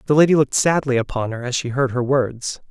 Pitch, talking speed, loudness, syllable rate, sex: 130 Hz, 245 wpm, -19 LUFS, 6.0 syllables/s, male